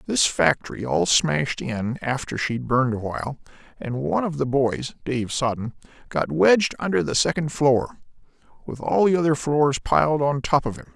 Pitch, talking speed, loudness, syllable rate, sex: 135 Hz, 170 wpm, -22 LUFS, 5.0 syllables/s, male